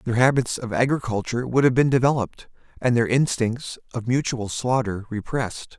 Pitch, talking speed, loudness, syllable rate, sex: 120 Hz, 155 wpm, -23 LUFS, 5.4 syllables/s, male